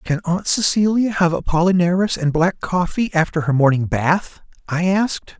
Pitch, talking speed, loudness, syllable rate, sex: 175 Hz, 155 wpm, -18 LUFS, 4.6 syllables/s, male